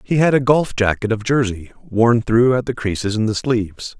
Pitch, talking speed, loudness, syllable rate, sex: 115 Hz, 225 wpm, -18 LUFS, 5.0 syllables/s, male